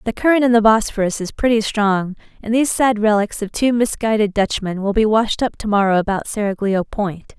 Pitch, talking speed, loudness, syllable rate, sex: 215 Hz, 195 wpm, -17 LUFS, 5.4 syllables/s, female